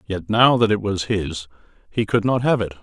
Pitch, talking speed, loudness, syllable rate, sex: 105 Hz, 235 wpm, -20 LUFS, 5.0 syllables/s, male